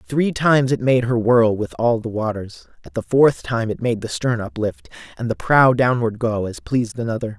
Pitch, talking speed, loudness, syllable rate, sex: 120 Hz, 220 wpm, -19 LUFS, 5.0 syllables/s, male